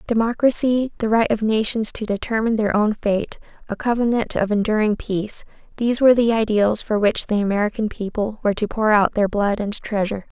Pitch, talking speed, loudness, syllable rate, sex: 215 Hz, 180 wpm, -20 LUFS, 5.7 syllables/s, female